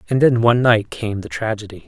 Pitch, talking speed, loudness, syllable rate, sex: 110 Hz, 225 wpm, -18 LUFS, 6.0 syllables/s, male